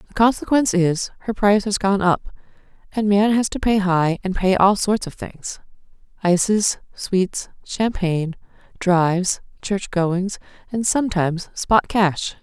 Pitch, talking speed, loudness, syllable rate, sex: 195 Hz, 140 wpm, -20 LUFS, 4.3 syllables/s, female